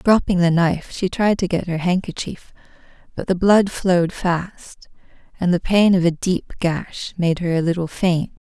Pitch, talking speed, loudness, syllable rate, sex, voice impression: 180 Hz, 185 wpm, -19 LUFS, 4.5 syllables/s, female, very feminine, middle-aged, slightly thin, very relaxed, weak, bright, very soft, very clear, fluent, slightly raspy, cute, slightly cool, very intellectual, slightly refreshing, very sincere, very calm, very friendly, very reassuring, very unique, very elegant, very wild, sweet, lively, very kind, modest, slightly light